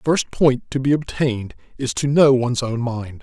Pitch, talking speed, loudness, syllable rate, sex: 125 Hz, 225 wpm, -19 LUFS, 5.2 syllables/s, male